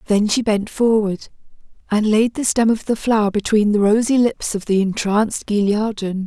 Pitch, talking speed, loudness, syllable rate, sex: 215 Hz, 180 wpm, -18 LUFS, 4.9 syllables/s, female